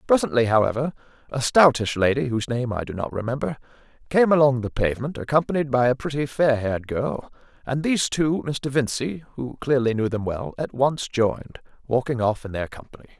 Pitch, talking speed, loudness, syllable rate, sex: 130 Hz, 180 wpm, -23 LUFS, 5.6 syllables/s, male